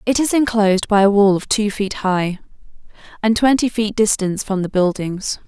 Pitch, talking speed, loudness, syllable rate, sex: 205 Hz, 185 wpm, -17 LUFS, 5.2 syllables/s, female